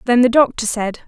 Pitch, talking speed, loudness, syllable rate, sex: 235 Hz, 225 wpm, -16 LUFS, 5.7 syllables/s, female